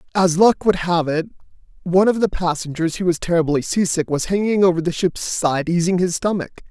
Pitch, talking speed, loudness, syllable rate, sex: 175 Hz, 195 wpm, -19 LUFS, 5.7 syllables/s, male